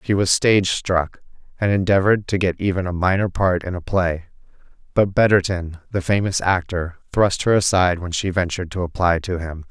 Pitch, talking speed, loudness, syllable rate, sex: 90 Hz, 185 wpm, -20 LUFS, 5.5 syllables/s, male